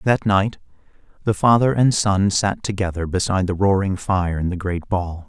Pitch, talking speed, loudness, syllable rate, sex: 95 Hz, 180 wpm, -20 LUFS, 4.8 syllables/s, male